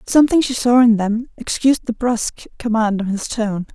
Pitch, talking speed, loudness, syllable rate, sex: 230 Hz, 190 wpm, -17 LUFS, 5.6 syllables/s, female